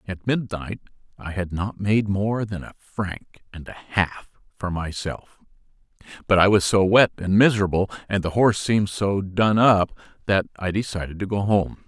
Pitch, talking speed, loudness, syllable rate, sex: 100 Hz, 175 wpm, -22 LUFS, 4.7 syllables/s, male